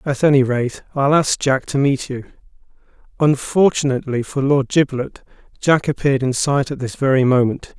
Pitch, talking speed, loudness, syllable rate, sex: 135 Hz, 160 wpm, -18 LUFS, 5.1 syllables/s, male